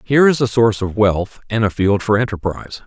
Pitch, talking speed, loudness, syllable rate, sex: 110 Hz, 230 wpm, -17 LUFS, 6.0 syllables/s, male